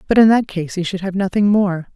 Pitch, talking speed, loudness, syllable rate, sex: 190 Hz, 275 wpm, -17 LUFS, 5.7 syllables/s, female